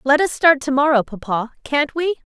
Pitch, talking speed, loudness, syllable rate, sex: 280 Hz, 200 wpm, -18 LUFS, 5.1 syllables/s, female